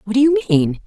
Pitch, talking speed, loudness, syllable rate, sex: 215 Hz, 280 wpm, -16 LUFS, 6.9 syllables/s, female